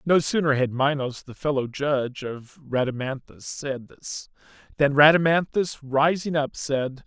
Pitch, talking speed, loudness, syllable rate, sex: 140 Hz, 135 wpm, -24 LUFS, 4.2 syllables/s, male